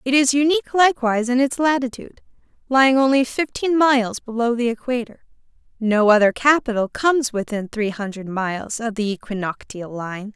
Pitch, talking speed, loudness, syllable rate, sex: 240 Hz, 150 wpm, -19 LUFS, 5.5 syllables/s, female